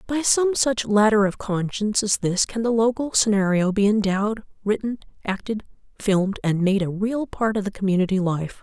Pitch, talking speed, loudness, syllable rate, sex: 210 Hz, 180 wpm, -22 LUFS, 5.3 syllables/s, female